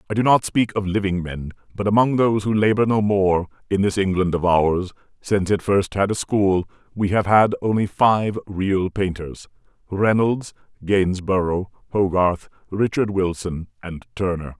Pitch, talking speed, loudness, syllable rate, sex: 95 Hz, 155 wpm, -20 LUFS, 4.6 syllables/s, male